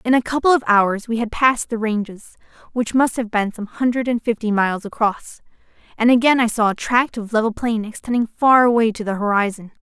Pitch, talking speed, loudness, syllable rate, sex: 225 Hz, 215 wpm, -18 LUFS, 5.6 syllables/s, female